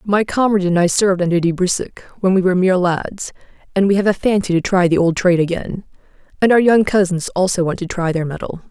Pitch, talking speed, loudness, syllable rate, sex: 185 Hz, 235 wpm, -16 LUFS, 6.3 syllables/s, female